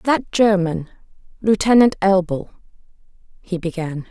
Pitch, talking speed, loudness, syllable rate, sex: 190 Hz, 90 wpm, -18 LUFS, 4.0 syllables/s, female